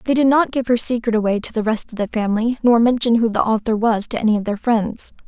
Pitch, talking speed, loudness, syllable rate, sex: 225 Hz, 275 wpm, -18 LUFS, 6.2 syllables/s, female